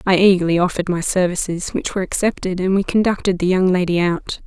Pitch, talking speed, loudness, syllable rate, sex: 185 Hz, 200 wpm, -18 LUFS, 6.2 syllables/s, female